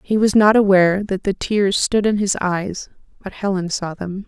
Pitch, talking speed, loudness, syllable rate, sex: 195 Hz, 210 wpm, -18 LUFS, 4.8 syllables/s, female